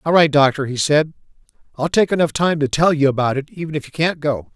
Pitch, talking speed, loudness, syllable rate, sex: 150 Hz, 250 wpm, -18 LUFS, 6.0 syllables/s, male